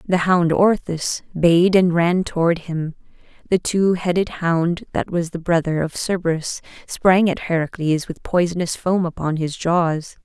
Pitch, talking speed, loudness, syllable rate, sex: 170 Hz, 160 wpm, -19 LUFS, 4.2 syllables/s, female